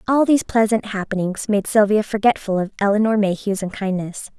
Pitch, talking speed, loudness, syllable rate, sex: 205 Hz, 150 wpm, -19 LUFS, 5.7 syllables/s, female